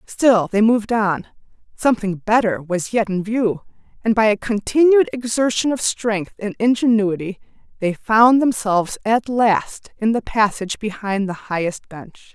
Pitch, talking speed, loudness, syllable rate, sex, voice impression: 215 Hz, 145 wpm, -18 LUFS, 4.5 syllables/s, female, feminine, adult-like, tensed, powerful, bright, clear, fluent, intellectual, friendly, lively, slightly strict, intense, sharp